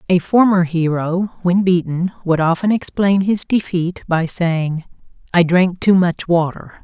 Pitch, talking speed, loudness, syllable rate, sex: 180 Hz, 150 wpm, -16 LUFS, 4.1 syllables/s, female